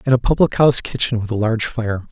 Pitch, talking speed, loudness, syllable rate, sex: 120 Hz, 255 wpm, -17 LUFS, 6.6 syllables/s, male